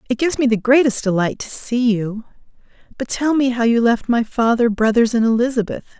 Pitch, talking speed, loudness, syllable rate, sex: 235 Hz, 200 wpm, -17 LUFS, 5.7 syllables/s, female